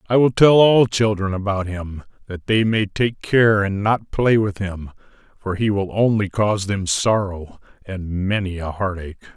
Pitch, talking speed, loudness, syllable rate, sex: 100 Hz, 180 wpm, -19 LUFS, 4.5 syllables/s, male